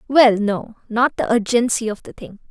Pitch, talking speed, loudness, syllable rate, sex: 225 Hz, 190 wpm, -18 LUFS, 4.8 syllables/s, female